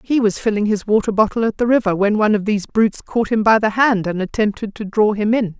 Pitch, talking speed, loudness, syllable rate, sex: 215 Hz, 270 wpm, -17 LUFS, 6.2 syllables/s, female